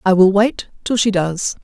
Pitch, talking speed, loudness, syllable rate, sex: 200 Hz, 220 wpm, -16 LUFS, 4.4 syllables/s, female